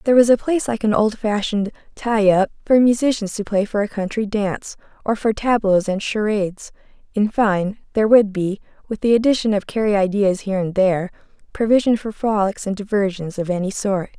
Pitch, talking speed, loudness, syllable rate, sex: 210 Hz, 185 wpm, -19 LUFS, 5.8 syllables/s, female